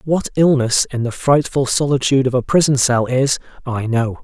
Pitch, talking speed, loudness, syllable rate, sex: 130 Hz, 185 wpm, -16 LUFS, 5.1 syllables/s, male